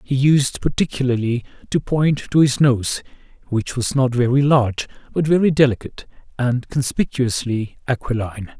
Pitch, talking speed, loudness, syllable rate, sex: 130 Hz, 135 wpm, -19 LUFS, 5.0 syllables/s, male